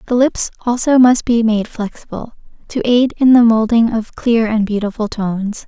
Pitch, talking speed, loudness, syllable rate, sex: 230 Hz, 180 wpm, -14 LUFS, 4.8 syllables/s, female